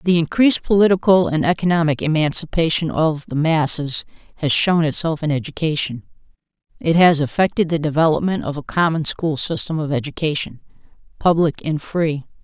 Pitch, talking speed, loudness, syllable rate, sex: 160 Hz, 140 wpm, -18 LUFS, 5.4 syllables/s, female